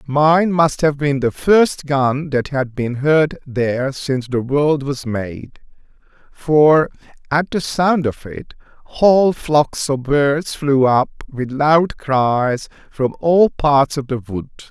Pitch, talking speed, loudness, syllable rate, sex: 140 Hz, 155 wpm, -17 LUFS, 3.3 syllables/s, male